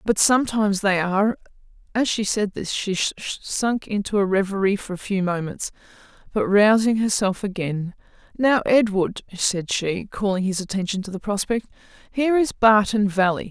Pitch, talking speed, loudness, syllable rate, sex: 205 Hz, 145 wpm, -21 LUFS, 5.1 syllables/s, female